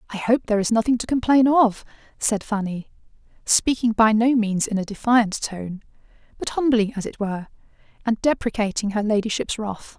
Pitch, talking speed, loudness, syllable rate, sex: 220 Hz, 170 wpm, -21 LUFS, 5.3 syllables/s, female